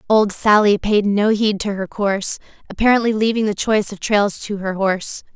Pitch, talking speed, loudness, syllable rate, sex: 205 Hz, 190 wpm, -18 LUFS, 5.3 syllables/s, female